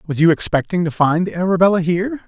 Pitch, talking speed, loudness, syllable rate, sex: 175 Hz, 210 wpm, -17 LUFS, 6.6 syllables/s, male